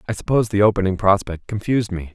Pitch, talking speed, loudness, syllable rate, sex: 100 Hz, 195 wpm, -19 LUFS, 7.1 syllables/s, male